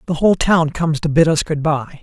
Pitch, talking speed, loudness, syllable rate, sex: 155 Hz, 265 wpm, -16 LUFS, 5.9 syllables/s, male